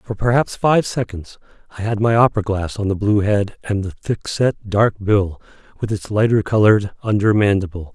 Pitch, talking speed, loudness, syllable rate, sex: 105 Hz, 190 wpm, -18 LUFS, 5.0 syllables/s, male